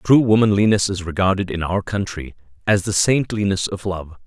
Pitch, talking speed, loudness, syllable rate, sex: 95 Hz, 170 wpm, -19 LUFS, 5.3 syllables/s, male